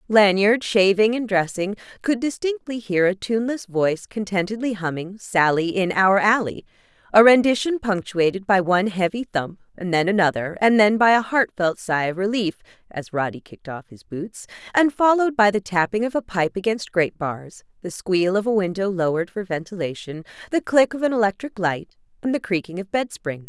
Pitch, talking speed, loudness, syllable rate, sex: 200 Hz, 175 wpm, -21 LUFS, 5.3 syllables/s, female